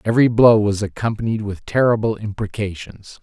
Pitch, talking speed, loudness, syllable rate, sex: 105 Hz, 130 wpm, -18 LUFS, 5.4 syllables/s, male